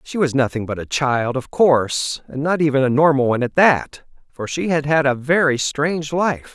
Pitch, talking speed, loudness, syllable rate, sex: 140 Hz, 220 wpm, -18 LUFS, 5.0 syllables/s, male